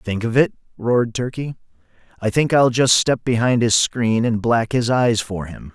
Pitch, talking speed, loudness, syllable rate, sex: 115 Hz, 200 wpm, -18 LUFS, 4.6 syllables/s, male